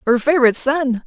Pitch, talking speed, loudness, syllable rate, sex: 265 Hz, 170 wpm, -16 LUFS, 6.5 syllables/s, female